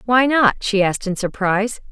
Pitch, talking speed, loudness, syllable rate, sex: 215 Hz, 190 wpm, -18 LUFS, 5.3 syllables/s, female